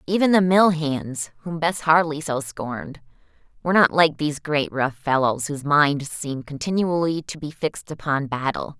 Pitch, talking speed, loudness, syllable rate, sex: 150 Hz, 170 wpm, -22 LUFS, 5.0 syllables/s, female